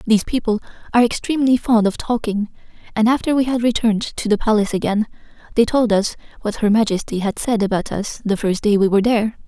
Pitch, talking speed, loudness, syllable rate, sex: 220 Hz, 205 wpm, -18 LUFS, 6.4 syllables/s, female